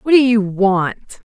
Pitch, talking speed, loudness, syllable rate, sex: 215 Hz, 180 wpm, -15 LUFS, 3.4 syllables/s, female